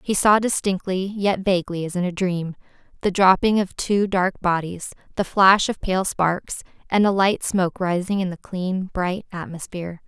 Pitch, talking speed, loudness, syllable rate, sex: 185 Hz, 180 wpm, -21 LUFS, 4.6 syllables/s, female